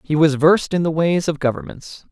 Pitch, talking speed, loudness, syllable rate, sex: 160 Hz, 225 wpm, -17 LUFS, 5.5 syllables/s, male